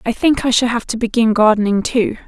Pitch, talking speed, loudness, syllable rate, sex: 230 Hz, 235 wpm, -15 LUFS, 5.7 syllables/s, female